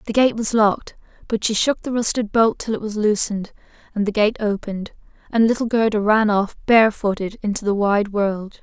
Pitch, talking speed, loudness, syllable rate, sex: 215 Hz, 195 wpm, -19 LUFS, 5.6 syllables/s, female